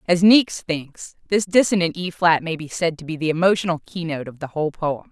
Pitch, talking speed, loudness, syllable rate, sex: 170 Hz, 225 wpm, -20 LUFS, 5.7 syllables/s, female